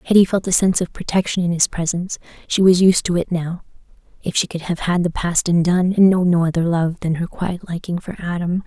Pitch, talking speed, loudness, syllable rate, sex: 175 Hz, 230 wpm, -18 LUFS, 5.9 syllables/s, female